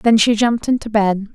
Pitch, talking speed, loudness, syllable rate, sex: 220 Hz, 225 wpm, -16 LUFS, 5.5 syllables/s, female